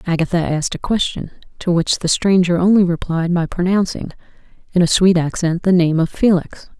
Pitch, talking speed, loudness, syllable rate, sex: 175 Hz, 175 wpm, -16 LUFS, 5.5 syllables/s, female